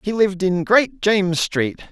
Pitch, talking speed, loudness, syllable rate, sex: 190 Hz, 190 wpm, -18 LUFS, 4.7 syllables/s, male